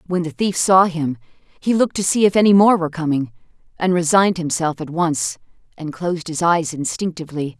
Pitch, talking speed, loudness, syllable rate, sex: 170 Hz, 190 wpm, -18 LUFS, 5.5 syllables/s, female